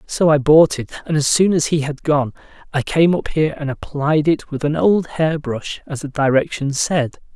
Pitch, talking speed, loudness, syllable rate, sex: 150 Hz, 210 wpm, -18 LUFS, 4.8 syllables/s, male